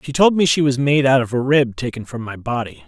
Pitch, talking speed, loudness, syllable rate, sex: 130 Hz, 290 wpm, -17 LUFS, 5.8 syllables/s, male